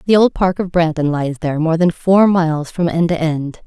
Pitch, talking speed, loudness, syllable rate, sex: 165 Hz, 245 wpm, -16 LUFS, 5.1 syllables/s, female